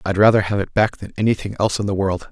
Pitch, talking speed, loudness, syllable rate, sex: 100 Hz, 285 wpm, -19 LUFS, 7.0 syllables/s, male